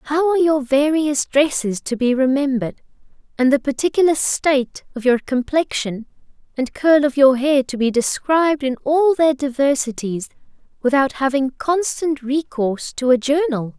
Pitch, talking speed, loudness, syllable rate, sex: 275 Hz, 150 wpm, -18 LUFS, 4.7 syllables/s, female